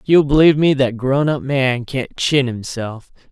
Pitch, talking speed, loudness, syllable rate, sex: 135 Hz, 200 wpm, -16 LUFS, 4.5 syllables/s, male